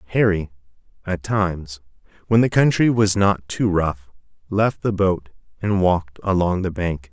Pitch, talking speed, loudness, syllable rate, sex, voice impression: 95 Hz, 150 wpm, -20 LUFS, 4.5 syllables/s, male, very masculine, very adult-like, slightly old, very thick, slightly tensed, powerful, slightly dark, slightly hard, slightly clear, fluent, slightly raspy, cool, very intellectual, sincere, very calm, friendly, reassuring, slightly unique, slightly elegant, wild, slightly sweet, slightly lively, kind, modest